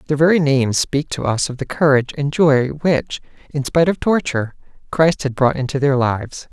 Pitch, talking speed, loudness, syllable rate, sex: 140 Hz, 200 wpm, -17 LUFS, 5.5 syllables/s, male